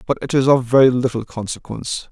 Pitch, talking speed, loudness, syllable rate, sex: 125 Hz, 200 wpm, -18 LUFS, 6.2 syllables/s, male